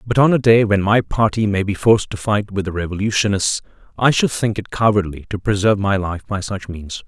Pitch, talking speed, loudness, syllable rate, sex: 100 Hz, 230 wpm, -18 LUFS, 5.7 syllables/s, male